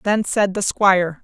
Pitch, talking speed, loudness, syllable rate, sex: 195 Hz, 195 wpm, -18 LUFS, 4.4 syllables/s, female